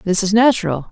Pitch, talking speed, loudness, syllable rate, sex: 200 Hz, 195 wpm, -15 LUFS, 5.9 syllables/s, female